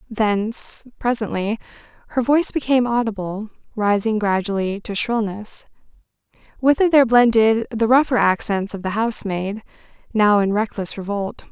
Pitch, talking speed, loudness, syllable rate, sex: 220 Hz, 125 wpm, -19 LUFS, 5.0 syllables/s, female